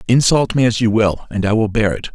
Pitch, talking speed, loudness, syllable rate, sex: 110 Hz, 280 wpm, -16 LUFS, 5.6 syllables/s, male